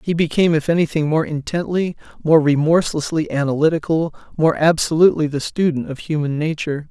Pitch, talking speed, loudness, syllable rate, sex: 155 Hz, 140 wpm, -18 LUFS, 6.0 syllables/s, male